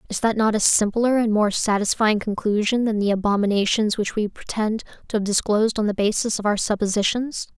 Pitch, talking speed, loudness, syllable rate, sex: 215 Hz, 190 wpm, -21 LUFS, 5.7 syllables/s, female